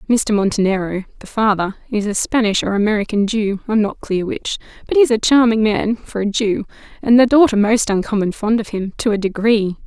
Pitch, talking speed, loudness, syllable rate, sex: 210 Hz, 200 wpm, -17 LUFS, 5.4 syllables/s, female